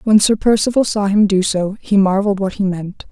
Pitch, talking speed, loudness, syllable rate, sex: 200 Hz, 230 wpm, -15 LUFS, 5.7 syllables/s, female